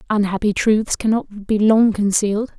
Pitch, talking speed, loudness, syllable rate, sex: 210 Hz, 140 wpm, -18 LUFS, 4.7 syllables/s, female